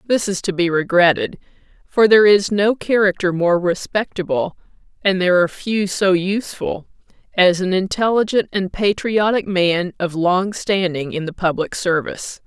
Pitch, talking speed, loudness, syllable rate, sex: 190 Hz, 150 wpm, -18 LUFS, 4.8 syllables/s, female